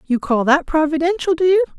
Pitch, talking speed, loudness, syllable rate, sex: 315 Hz, 200 wpm, -17 LUFS, 5.8 syllables/s, female